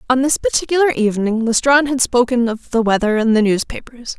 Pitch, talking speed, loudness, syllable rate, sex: 245 Hz, 185 wpm, -16 LUFS, 6.0 syllables/s, female